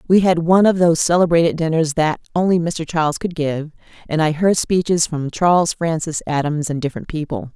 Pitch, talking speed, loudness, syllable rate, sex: 165 Hz, 190 wpm, -18 LUFS, 5.6 syllables/s, female